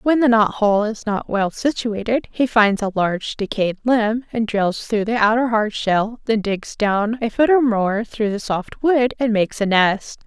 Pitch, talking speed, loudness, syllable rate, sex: 220 Hz, 210 wpm, -19 LUFS, 4.3 syllables/s, female